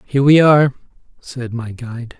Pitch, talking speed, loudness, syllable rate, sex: 130 Hz, 165 wpm, -14 LUFS, 5.5 syllables/s, male